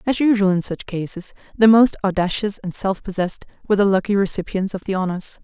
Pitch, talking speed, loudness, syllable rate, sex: 195 Hz, 200 wpm, -19 LUFS, 6.0 syllables/s, female